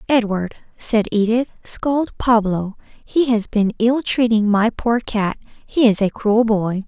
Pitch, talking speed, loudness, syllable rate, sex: 225 Hz, 155 wpm, -18 LUFS, 3.7 syllables/s, female